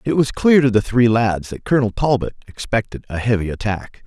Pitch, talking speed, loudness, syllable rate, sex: 115 Hz, 205 wpm, -18 LUFS, 5.5 syllables/s, male